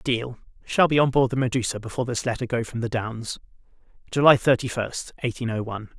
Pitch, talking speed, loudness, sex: 120 Hz, 180 wpm, -24 LUFS, male